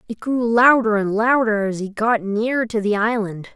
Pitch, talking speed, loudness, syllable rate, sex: 220 Hz, 200 wpm, -19 LUFS, 4.8 syllables/s, female